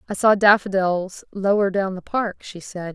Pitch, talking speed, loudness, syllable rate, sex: 195 Hz, 185 wpm, -20 LUFS, 4.4 syllables/s, female